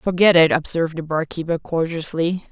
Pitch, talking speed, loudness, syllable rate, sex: 165 Hz, 145 wpm, -19 LUFS, 5.3 syllables/s, female